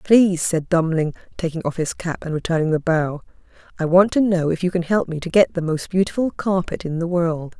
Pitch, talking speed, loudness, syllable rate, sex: 170 Hz, 230 wpm, -20 LUFS, 5.6 syllables/s, female